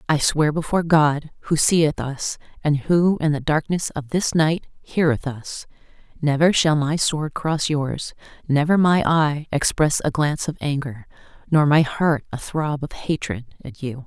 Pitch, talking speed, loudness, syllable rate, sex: 150 Hz, 170 wpm, -21 LUFS, 4.3 syllables/s, female